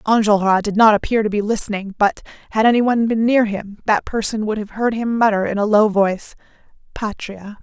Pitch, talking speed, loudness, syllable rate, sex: 215 Hz, 205 wpm, -17 LUFS, 5.6 syllables/s, female